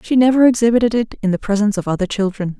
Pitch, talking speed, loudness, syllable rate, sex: 215 Hz, 230 wpm, -16 LUFS, 7.5 syllables/s, female